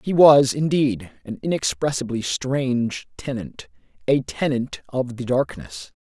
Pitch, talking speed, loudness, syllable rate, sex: 120 Hz, 120 wpm, -22 LUFS, 4.1 syllables/s, male